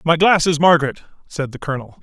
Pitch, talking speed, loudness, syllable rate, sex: 155 Hz, 180 wpm, -17 LUFS, 6.6 syllables/s, male